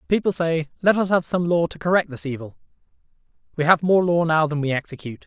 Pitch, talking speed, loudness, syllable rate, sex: 165 Hz, 205 wpm, -21 LUFS, 6.3 syllables/s, male